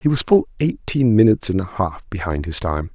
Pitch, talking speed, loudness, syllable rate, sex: 105 Hz, 225 wpm, -19 LUFS, 5.4 syllables/s, male